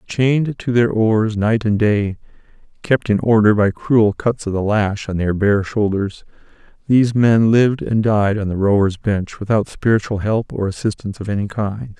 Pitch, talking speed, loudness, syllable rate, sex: 110 Hz, 185 wpm, -17 LUFS, 4.7 syllables/s, male